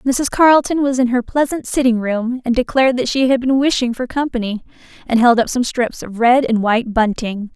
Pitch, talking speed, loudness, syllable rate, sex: 245 Hz, 215 wpm, -16 LUFS, 5.4 syllables/s, female